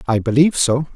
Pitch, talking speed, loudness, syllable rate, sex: 135 Hz, 190 wpm, -16 LUFS, 6.6 syllables/s, male